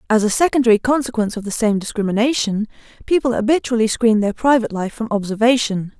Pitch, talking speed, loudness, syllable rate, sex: 230 Hz, 160 wpm, -18 LUFS, 6.5 syllables/s, female